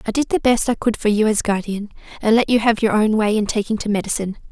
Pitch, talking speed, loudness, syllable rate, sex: 215 Hz, 280 wpm, -18 LUFS, 6.5 syllables/s, female